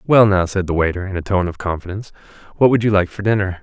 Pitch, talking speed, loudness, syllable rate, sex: 95 Hz, 265 wpm, -17 LUFS, 6.8 syllables/s, male